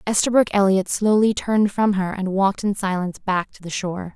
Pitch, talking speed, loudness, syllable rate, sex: 195 Hz, 200 wpm, -20 LUFS, 5.6 syllables/s, female